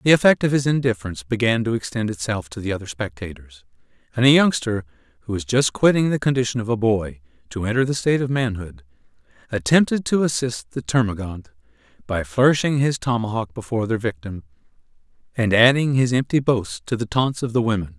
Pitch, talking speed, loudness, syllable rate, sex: 115 Hz, 180 wpm, -20 LUFS, 6.0 syllables/s, male